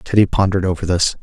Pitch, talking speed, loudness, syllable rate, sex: 95 Hz, 195 wpm, -17 LUFS, 7.0 syllables/s, male